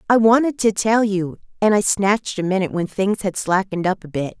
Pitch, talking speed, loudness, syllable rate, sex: 200 Hz, 230 wpm, -19 LUFS, 5.8 syllables/s, female